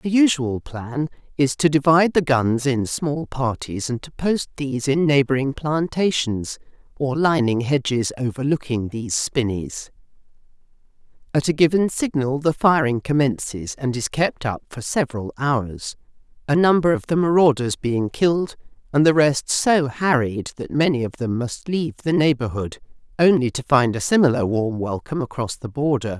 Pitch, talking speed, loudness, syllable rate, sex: 135 Hz, 155 wpm, -21 LUFS, 4.7 syllables/s, female